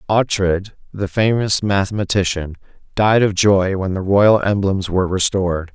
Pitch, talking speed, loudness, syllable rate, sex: 100 Hz, 135 wpm, -17 LUFS, 4.6 syllables/s, male